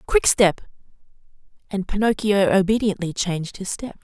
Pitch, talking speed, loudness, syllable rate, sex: 200 Hz, 105 wpm, -21 LUFS, 5.0 syllables/s, female